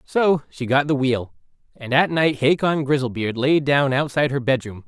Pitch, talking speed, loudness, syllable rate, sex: 135 Hz, 185 wpm, -20 LUFS, 4.9 syllables/s, male